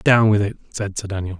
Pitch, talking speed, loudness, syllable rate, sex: 105 Hz, 260 wpm, -20 LUFS, 5.8 syllables/s, male